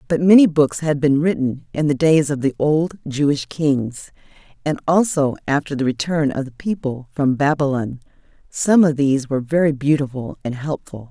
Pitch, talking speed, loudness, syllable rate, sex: 145 Hz, 175 wpm, -19 LUFS, 5.0 syllables/s, female